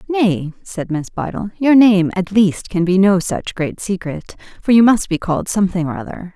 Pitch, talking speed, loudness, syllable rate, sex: 190 Hz, 210 wpm, -16 LUFS, 4.9 syllables/s, female